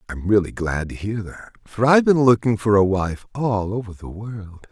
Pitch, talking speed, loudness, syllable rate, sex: 105 Hz, 215 wpm, -20 LUFS, 4.8 syllables/s, male